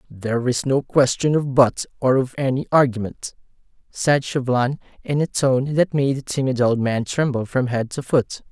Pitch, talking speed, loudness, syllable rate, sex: 130 Hz, 185 wpm, -20 LUFS, 4.8 syllables/s, male